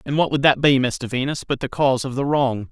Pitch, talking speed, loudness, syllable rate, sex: 135 Hz, 290 wpm, -20 LUFS, 5.8 syllables/s, male